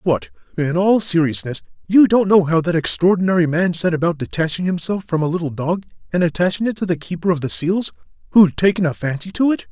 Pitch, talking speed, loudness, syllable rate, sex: 165 Hz, 205 wpm, -18 LUFS, 6.0 syllables/s, male